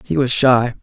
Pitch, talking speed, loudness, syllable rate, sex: 125 Hz, 215 wpm, -15 LUFS, 4.4 syllables/s, male